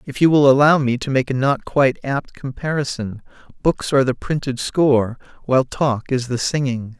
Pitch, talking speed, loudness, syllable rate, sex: 135 Hz, 190 wpm, -18 LUFS, 5.2 syllables/s, male